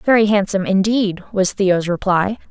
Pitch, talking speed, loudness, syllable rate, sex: 200 Hz, 145 wpm, -17 LUFS, 4.8 syllables/s, female